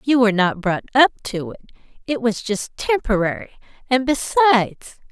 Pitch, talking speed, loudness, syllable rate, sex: 230 Hz, 150 wpm, -19 LUFS, 5.0 syllables/s, female